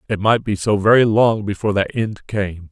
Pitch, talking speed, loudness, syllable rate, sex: 105 Hz, 220 wpm, -17 LUFS, 5.3 syllables/s, male